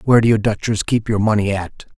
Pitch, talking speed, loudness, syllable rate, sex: 105 Hz, 240 wpm, -17 LUFS, 6.3 syllables/s, male